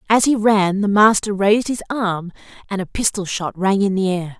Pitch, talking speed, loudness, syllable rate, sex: 200 Hz, 220 wpm, -18 LUFS, 5.1 syllables/s, female